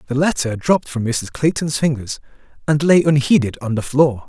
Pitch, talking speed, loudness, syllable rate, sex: 140 Hz, 180 wpm, -17 LUFS, 5.4 syllables/s, male